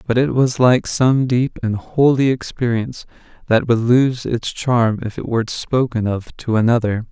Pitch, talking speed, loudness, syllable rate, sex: 120 Hz, 175 wpm, -17 LUFS, 4.5 syllables/s, male